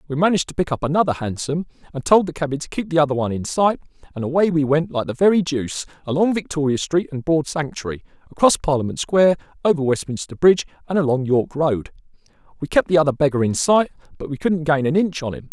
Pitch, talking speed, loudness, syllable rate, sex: 150 Hz, 220 wpm, -20 LUFS, 6.5 syllables/s, male